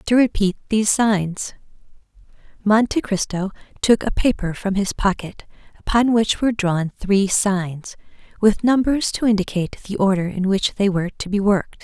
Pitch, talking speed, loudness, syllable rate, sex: 205 Hz, 155 wpm, -20 LUFS, 4.9 syllables/s, female